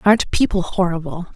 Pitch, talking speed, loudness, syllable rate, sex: 185 Hz, 135 wpm, -19 LUFS, 5.9 syllables/s, female